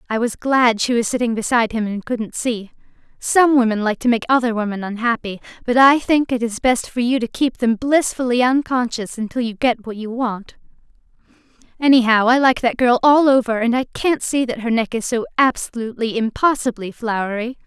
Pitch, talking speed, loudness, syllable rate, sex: 240 Hz, 195 wpm, -18 LUFS, 5.4 syllables/s, female